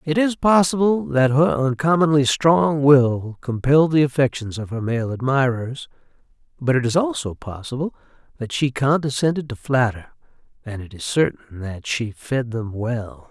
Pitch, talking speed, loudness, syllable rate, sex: 130 Hz, 155 wpm, -20 LUFS, 4.6 syllables/s, male